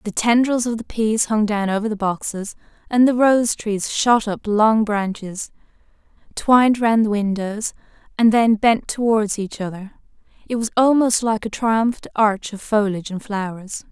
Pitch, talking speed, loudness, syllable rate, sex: 215 Hz, 170 wpm, -19 LUFS, 4.5 syllables/s, female